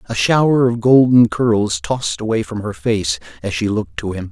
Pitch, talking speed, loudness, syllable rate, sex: 105 Hz, 210 wpm, -16 LUFS, 5.0 syllables/s, male